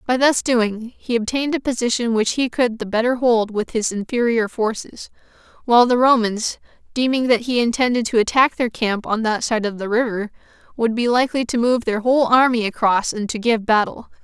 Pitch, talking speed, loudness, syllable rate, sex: 235 Hz, 200 wpm, -19 LUFS, 5.4 syllables/s, female